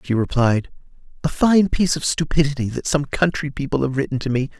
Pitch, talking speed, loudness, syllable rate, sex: 140 Hz, 195 wpm, -20 LUFS, 5.9 syllables/s, male